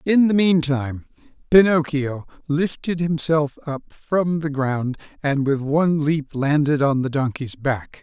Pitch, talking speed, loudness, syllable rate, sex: 150 Hz, 140 wpm, -20 LUFS, 4.1 syllables/s, male